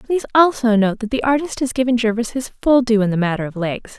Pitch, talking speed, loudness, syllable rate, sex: 235 Hz, 255 wpm, -18 LUFS, 6.2 syllables/s, female